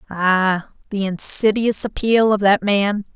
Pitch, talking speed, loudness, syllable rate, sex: 200 Hz, 135 wpm, -17 LUFS, 3.7 syllables/s, female